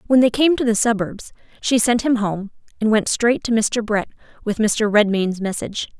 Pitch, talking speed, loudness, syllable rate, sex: 220 Hz, 200 wpm, -19 LUFS, 5.0 syllables/s, female